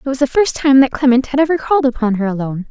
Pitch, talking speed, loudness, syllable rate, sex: 260 Hz, 290 wpm, -14 LUFS, 7.1 syllables/s, female